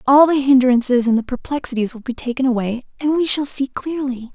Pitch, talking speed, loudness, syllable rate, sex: 260 Hz, 195 wpm, -18 LUFS, 5.5 syllables/s, female